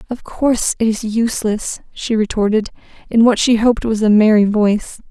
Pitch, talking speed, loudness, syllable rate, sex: 220 Hz, 175 wpm, -15 LUFS, 5.4 syllables/s, female